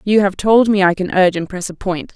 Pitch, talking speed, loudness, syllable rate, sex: 190 Hz, 305 wpm, -15 LUFS, 5.9 syllables/s, female